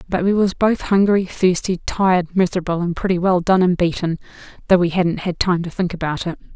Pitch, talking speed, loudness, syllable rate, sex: 180 Hz, 210 wpm, -18 LUFS, 5.9 syllables/s, female